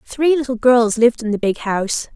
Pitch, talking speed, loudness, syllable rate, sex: 235 Hz, 225 wpm, -17 LUFS, 5.5 syllables/s, female